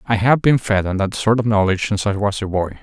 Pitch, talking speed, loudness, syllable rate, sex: 105 Hz, 295 wpm, -18 LUFS, 6.3 syllables/s, male